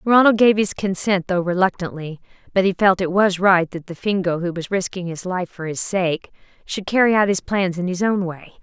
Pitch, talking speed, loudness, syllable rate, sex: 185 Hz, 225 wpm, -19 LUFS, 5.2 syllables/s, female